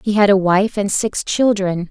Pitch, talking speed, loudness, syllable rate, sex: 200 Hz, 220 wpm, -16 LUFS, 4.4 syllables/s, female